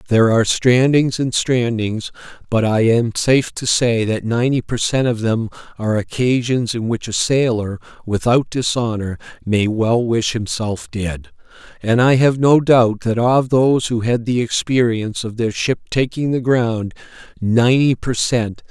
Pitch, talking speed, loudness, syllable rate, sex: 120 Hz, 165 wpm, -17 LUFS, 4.5 syllables/s, male